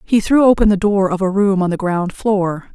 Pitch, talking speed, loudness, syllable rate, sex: 195 Hz, 260 wpm, -15 LUFS, 5.0 syllables/s, female